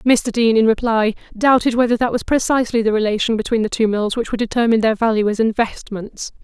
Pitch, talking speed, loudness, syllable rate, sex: 225 Hz, 205 wpm, -17 LUFS, 6.2 syllables/s, female